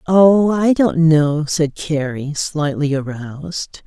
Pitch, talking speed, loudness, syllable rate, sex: 155 Hz, 125 wpm, -17 LUFS, 3.4 syllables/s, female